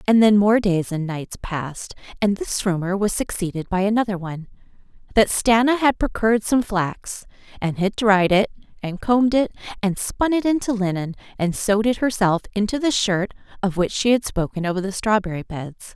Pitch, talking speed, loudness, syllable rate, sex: 205 Hz, 180 wpm, -21 LUFS, 5.3 syllables/s, female